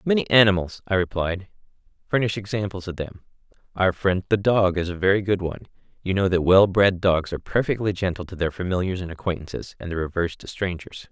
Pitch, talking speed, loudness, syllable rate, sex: 95 Hz, 195 wpm, -23 LUFS, 6.1 syllables/s, male